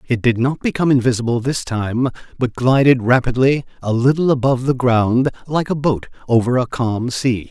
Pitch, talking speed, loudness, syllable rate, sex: 125 Hz, 175 wpm, -17 LUFS, 5.2 syllables/s, male